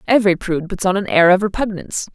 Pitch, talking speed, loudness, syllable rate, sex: 190 Hz, 225 wpm, -17 LUFS, 7.2 syllables/s, female